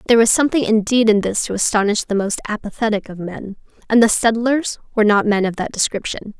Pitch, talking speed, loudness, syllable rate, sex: 215 Hz, 205 wpm, -17 LUFS, 6.2 syllables/s, female